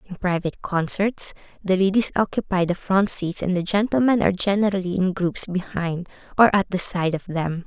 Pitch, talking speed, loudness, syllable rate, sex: 190 Hz, 180 wpm, -22 LUFS, 5.2 syllables/s, female